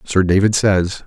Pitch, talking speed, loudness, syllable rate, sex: 95 Hz, 170 wpm, -15 LUFS, 4.1 syllables/s, male